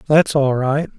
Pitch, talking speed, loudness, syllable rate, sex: 140 Hz, 185 wpm, -17 LUFS, 4.4 syllables/s, male